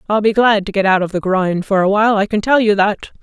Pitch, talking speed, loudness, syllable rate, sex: 205 Hz, 315 wpm, -15 LUFS, 6.1 syllables/s, female